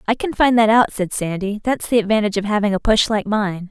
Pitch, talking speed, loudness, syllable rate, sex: 210 Hz, 260 wpm, -18 LUFS, 6.0 syllables/s, female